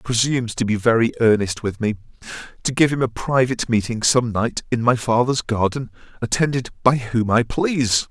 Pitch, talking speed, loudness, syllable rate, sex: 120 Hz, 185 wpm, -19 LUFS, 5.4 syllables/s, male